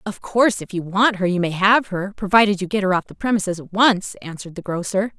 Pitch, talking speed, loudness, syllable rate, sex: 195 Hz, 255 wpm, -19 LUFS, 6.0 syllables/s, female